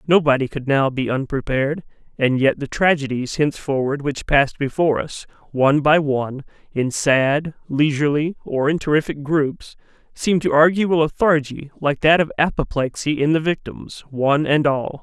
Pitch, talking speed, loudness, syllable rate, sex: 145 Hz, 155 wpm, -19 LUFS, 5.2 syllables/s, male